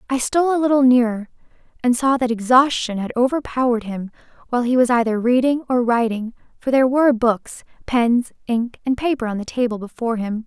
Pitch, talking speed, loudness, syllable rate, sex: 245 Hz, 185 wpm, -19 LUFS, 5.9 syllables/s, female